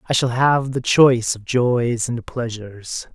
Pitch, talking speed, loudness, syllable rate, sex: 120 Hz, 170 wpm, -19 LUFS, 4.0 syllables/s, male